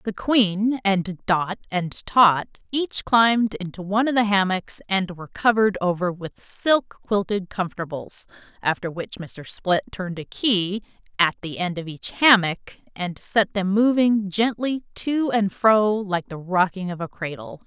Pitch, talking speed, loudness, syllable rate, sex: 195 Hz, 165 wpm, -22 LUFS, 4.2 syllables/s, female